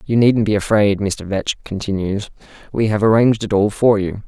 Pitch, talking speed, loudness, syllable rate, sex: 105 Hz, 195 wpm, -17 LUFS, 5.2 syllables/s, male